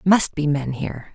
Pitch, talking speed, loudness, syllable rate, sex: 155 Hz, 210 wpm, -22 LUFS, 4.8 syllables/s, female